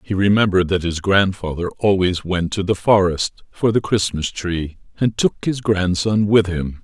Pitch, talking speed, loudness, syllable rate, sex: 95 Hz, 175 wpm, -18 LUFS, 4.6 syllables/s, male